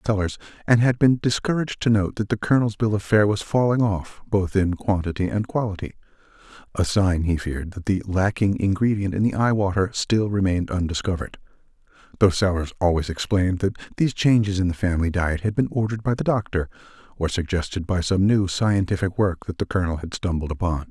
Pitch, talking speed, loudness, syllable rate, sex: 100 Hz, 180 wpm, -22 LUFS, 6.0 syllables/s, male